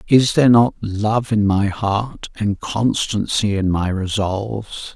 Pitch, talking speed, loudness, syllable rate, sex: 105 Hz, 145 wpm, -18 LUFS, 3.7 syllables/s, male